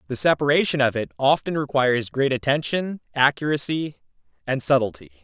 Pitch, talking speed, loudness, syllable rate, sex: 135 Hz, 125 wpm, -22 LUFS, 5.6 syllables/s, male